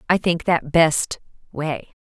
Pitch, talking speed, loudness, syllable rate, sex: 165 Hz, 145 wpm, -20 LUFS, 3.5 syllables/s, female